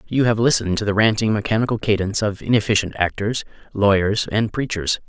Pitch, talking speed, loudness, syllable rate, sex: 105 Hz, 165 wpm, -19 LUFS, 6.1 syllables/s, male